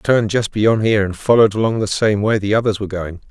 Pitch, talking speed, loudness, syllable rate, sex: 105 Hz, 255 wpm, -16 LUFS, 6.5 syllables/s, male